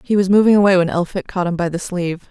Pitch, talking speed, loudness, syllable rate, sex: 185 Hz, 285 wpm, -16 LUFS, 6.8 syllables/s, female